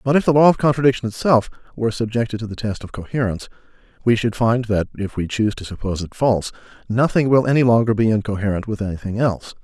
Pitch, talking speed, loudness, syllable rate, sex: 115 Hz, 210 wpm, -19 LUFS, 7.0 syllables/s, male